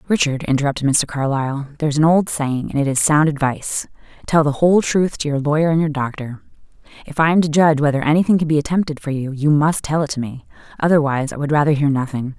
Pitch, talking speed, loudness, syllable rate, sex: 150 Hz, 230 wpm, -18 LUFS, 6.5 syllables/s, female